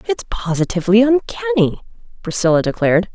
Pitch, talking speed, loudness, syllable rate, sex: 215 Hz, 95 wpm, -17 LUFS, 6.0 syllables/s, female